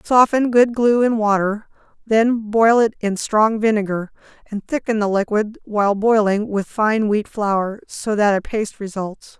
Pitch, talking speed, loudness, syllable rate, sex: 215 Hz, 165 wpm, -18 LUFS, 4.3 syllables/s, female